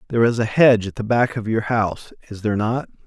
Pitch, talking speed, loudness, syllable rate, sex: 110 Hz, 255 wpm, -19 LUFS, 6.7 syllables/s, male